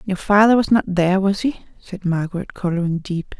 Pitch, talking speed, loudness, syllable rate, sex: 190 Hz, 195 wpm, -19 LUFS, 5.5 syllables/s, female